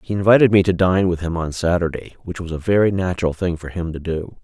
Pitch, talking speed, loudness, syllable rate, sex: 90 Hz, 255 wpm, -19 LUFS, 6.2 syllables/s, male